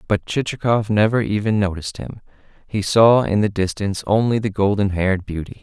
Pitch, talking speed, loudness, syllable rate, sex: 105 Hz, 170 wpm, -19 LUFS, 5.6 syllables/s, male